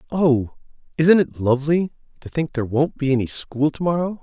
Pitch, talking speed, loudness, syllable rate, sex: 150 Hz, 185 wpm, -20 LUFS, 5.4 syllables/s, male